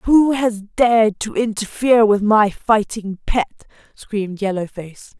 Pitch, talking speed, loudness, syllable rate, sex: 215 Hz, 140 wpm, -17 LUFS, 4.1 syllables/s, female